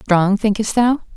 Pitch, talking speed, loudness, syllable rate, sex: 210 Hz, 155 wpm, -17 LUFS, 4.0 syllables/s, female